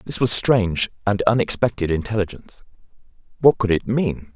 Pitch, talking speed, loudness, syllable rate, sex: 105 Hz, 140 wpm, -20 LUFS, 5.5 syllables/s, male